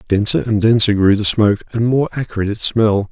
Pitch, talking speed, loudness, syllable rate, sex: 110 Hz, 210 wpm, -15 LUFS, 5.4 syllables/s, male